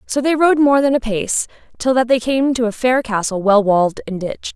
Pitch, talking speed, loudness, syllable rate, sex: 240 Hz, 250 wpm, -16 LUFS, 5.3 syllables/s, female